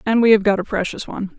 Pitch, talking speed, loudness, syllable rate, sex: 210 Hz, 305 wpm, -18 LUFS, 7.1 syllables/s, female